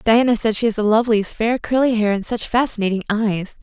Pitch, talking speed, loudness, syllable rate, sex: 220 Hz, 215 wpm, -18 LUFS, 5.8 syllables/s, female